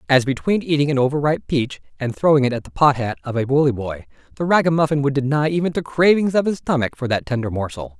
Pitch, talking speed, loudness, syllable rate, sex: 135 Hz, 240 wpm, -19 LUFS, 6.4 syllables/s, male